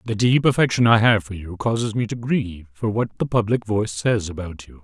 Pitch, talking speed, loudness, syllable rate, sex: 105 Hz, 235 wpm, -20 LUFS, 5.8 syllables/s, male